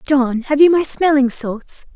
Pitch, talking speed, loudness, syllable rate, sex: 275 Hz, 185 wpm, -15 LUFS, 4.1 syllables/s, female